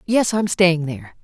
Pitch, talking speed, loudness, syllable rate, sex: 175 Hz, 195 wpm, -19 LUFS, 4.9 syllables/s, female